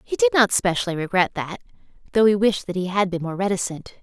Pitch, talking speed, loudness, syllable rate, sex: 195 Hz, 225 wpm, -21 LUFS, 6.0 syllables/s, female